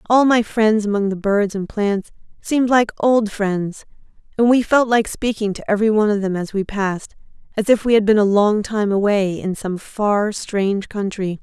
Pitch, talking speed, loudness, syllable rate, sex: 210 Hz, 205 wpm, -18 LUFS, 4.9 syllables/s, female